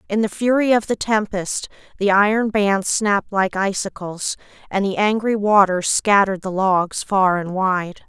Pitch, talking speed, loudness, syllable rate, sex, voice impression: 200 Hz, 165 wpm, -19 LUFS, 4.4 syllables/s, female, very feminine, slightly middle-aged, very thin, very tensed, slightly powerful, slightly bright, hard, very clear, very fluent, slightly cool, intellectual, slightly refreshing, sincere, calm, slightly friendly, slightly reassuring, very unique, slightly elegant, wild, sweet, lively, slightly strict, intense, slightly sharp, light